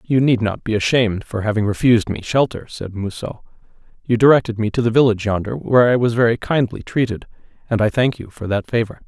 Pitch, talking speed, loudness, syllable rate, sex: 115 Hz, 210 wpm, -18 LUFS, 6.2 syllables/s, male